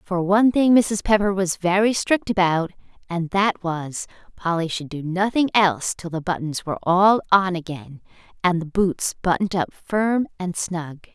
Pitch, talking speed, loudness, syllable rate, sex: 185 Hz, 165 wpm, -21 LUFS, 4.6 syllables/s, female